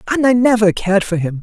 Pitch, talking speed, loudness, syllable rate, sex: 210 Hz, 250 wpm, -14 LUFS, 6.2 syllables/s, male